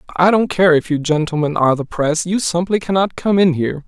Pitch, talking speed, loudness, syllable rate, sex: 170 Hz, 230 wpm, -16 LUFS, 5.9 syllables/s, male